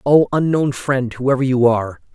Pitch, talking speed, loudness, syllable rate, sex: 130 Hz, 170 wpm, -17 LUFS, 4.8 syllables/s, male